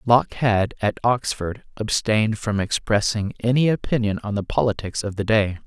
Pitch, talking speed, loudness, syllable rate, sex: 110 Hz, 160 wpm, -22 LUFS, 5.0 syllables/s, male